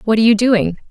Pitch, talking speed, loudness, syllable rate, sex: 220 Hz, 265 wpm, -14 LUFS, 7.3 syllables/s, female